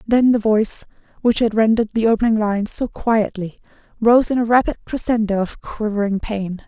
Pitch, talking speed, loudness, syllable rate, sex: 220 Hz, 170 wpm, -18 LUFS, 5.4 syllables/s, female